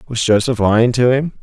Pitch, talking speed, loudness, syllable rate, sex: 120 Hz, 210 wpm, -14 LUFS, 5.8 syllables/s, male